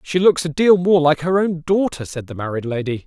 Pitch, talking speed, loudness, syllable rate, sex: 160 Hz, 255 wpm, -18 LUFS, 5.4 syllables/s, male